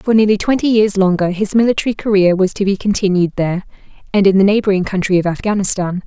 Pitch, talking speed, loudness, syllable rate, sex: 195 Hz, 200 wpm, -15 LUFS, 6.5 syllables/s, female